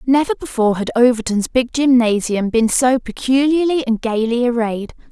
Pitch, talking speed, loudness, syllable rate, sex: 240 Hz, 140 wpm, -16 LUFS, 5.0 syllables/s, female